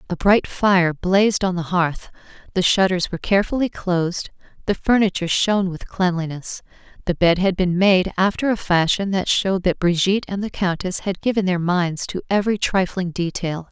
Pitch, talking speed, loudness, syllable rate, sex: 185 Hz, 175 wpm, -20 LUFS, 5.3 syllables/s, female